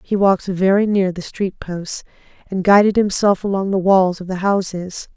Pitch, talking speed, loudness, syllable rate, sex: 190 Hz, 185 wpm, -17 LUFS, 4.8 syllables/s, female